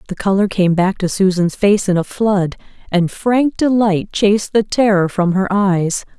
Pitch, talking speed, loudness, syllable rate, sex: 195 Hz, 185 wpm, -15 LUFS, 4.4 syllables/s, female